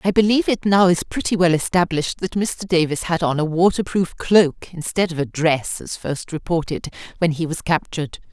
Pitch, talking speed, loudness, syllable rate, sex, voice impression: 170 Hz, 200 wpm, -20 LUFS, 5.3 syllables/s, female, slightly masculine, feminine, very gender-neutral, adult-like, middle-aged, slightly thin, tensed, slightly powerful, bright, hard, clear, fluent, cool, intellectual, refreshing, very sincere, slightly calm, slightly friendly, slightly reassuring, very unique, slightly elegant, wild, very lively, strict, intense, sharp